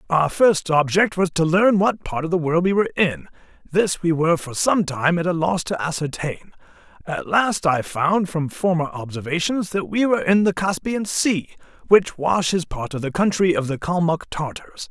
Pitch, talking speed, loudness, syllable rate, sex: 170 Hz, 195 wpm, -20 LUFS, 4.8 syllables/s, male